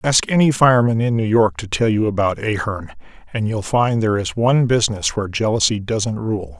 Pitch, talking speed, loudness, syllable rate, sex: 110 Hz, 200 wpm, -18 LUFS, 5.6 syllables/s, male